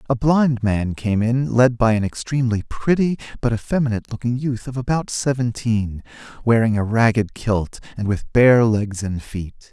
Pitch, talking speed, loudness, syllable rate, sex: 115 Hz, 165 wpm, -20 LUFS, 4.9 syllables/s, male